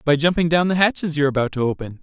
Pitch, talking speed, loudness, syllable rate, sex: 155 Hz, 265 wpm, -19 LUFS, 7.3 syllables/s, male